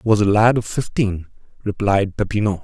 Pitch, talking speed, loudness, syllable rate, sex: 105 Hz, 160 wpm, -19 LUFS, 4.9 syllables/s, male